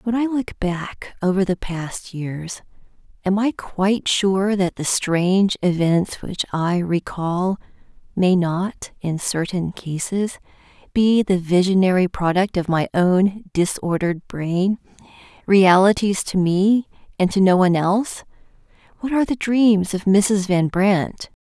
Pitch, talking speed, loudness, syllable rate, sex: 190 Hz, 135 wpm, -20 LUFS, 3.9 syllables/s, female